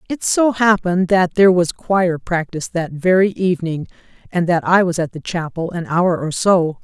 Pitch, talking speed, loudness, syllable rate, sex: 175 Hz, 195 wpm, -17 LUFS, 5.0 syllables/s, female